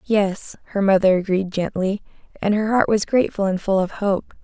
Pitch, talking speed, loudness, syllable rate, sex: 200 Hz, 190 wpm, -20 LUFS, 5.1 syllables/s, female